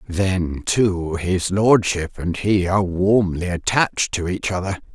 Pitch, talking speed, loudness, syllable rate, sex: 95 Hz, 145 wpm, -20 LUFS, 3.9 syllables/s, female